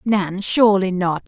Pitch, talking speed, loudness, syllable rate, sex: 195 Hz, 140 wpm, -18 LUFS, 4.4 syllables/s, female